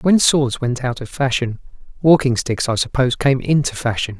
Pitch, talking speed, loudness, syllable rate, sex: 130 Hz, 185 wpm, -18 LUFS, 5.1 syllables/s, male